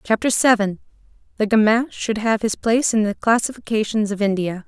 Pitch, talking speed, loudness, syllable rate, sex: 215 Hz, 155 wpm, -19 LUFS, 5.6 syllables/s, female